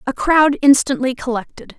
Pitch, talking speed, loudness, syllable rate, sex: 265 Hz, 135 wpm, -15 LUFS, 4.9 syllables/s, female